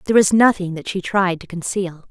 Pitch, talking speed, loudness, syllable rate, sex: 185 Hz, 230 wpm, -18 LUFS, 5.7 syllables/s, female